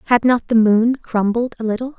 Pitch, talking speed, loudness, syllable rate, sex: 230 Hz, 210 wpm, -17 LUFS, 5.2 syllables/s, female